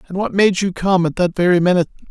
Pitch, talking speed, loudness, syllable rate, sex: 180 Hz, 255 wpm, -16 LUFS, 7.0 syllables/s, male